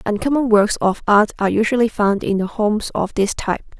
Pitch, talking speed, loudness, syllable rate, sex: 215 Hz, 205 wpm, -18 LUFS, 5.7 syllables/s, female